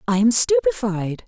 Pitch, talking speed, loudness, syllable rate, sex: 200 Hz, 140 wpm, -19 LUFS, 4.4 syllables/s, female